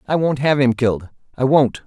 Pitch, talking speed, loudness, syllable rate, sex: 135 Hz, 195 wpm, -17 LUFS, 5.4 syllables/s, male